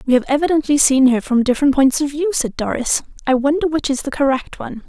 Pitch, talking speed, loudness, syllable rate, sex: 275 Hz, 235 wpm, -17 LUFS, 6.3 syllables/s, female